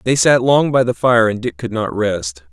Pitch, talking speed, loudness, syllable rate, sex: 110 Hz, 260 wpm, -15 LUFS, 4.7 syllables/s, male